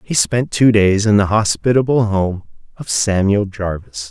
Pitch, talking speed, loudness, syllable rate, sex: 100 Hz, 160 wpm, -15 LUFS, 4.3 syllables/s, male